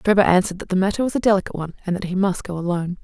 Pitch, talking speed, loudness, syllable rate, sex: 185 Hz, 295 wpm, -21 LUFS, 8.9 syllables/s, female